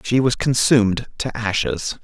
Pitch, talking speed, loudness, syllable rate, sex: 110 Hz, 145 wpm, -19 LUFS, 4.4 syllables/s, male